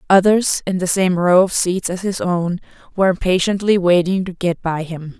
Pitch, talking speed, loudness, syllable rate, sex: 180 Hz, 195 wpm, -17 LUFS, 5.0 syllables/s, female